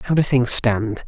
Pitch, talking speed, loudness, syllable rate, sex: 120 Hz, 225 wpm, -16 LUFS, 4.6 syllables/s, male